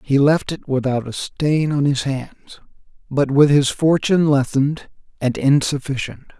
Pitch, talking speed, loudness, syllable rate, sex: 140 Hz, 150 wpm, -18 LUFS, 4.7 syllables/s, male